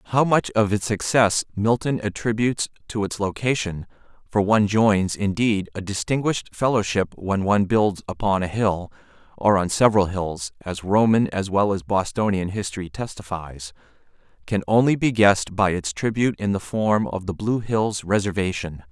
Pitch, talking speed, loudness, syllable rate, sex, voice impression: 105 Hz, 150 wpm, -22 LUFS, 5.0 syllables/s, male, masculine, adult-like, tensed, powerful, bright, clear, fluent, cool, calm, wild, lively, slightly kind